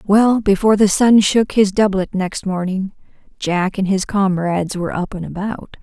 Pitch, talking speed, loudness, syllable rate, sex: 195 Hz, 175 wpm, -17 LUFS, 4.8 syllables/s, female